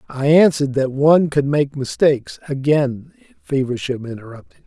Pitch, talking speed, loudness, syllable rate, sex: 140 Hz, 130 wpm, -17 LUFS, 5.2 syllables/s, male